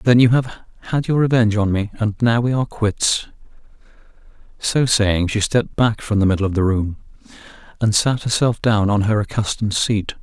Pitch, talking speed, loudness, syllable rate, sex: 110 Hz, 190 wpm, -18 LUFS, 5.3 syllables/s, male